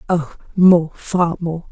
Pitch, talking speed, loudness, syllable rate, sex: 170 Hz, 105 wpm, -17 LUFS, 3.2 syllables/s, female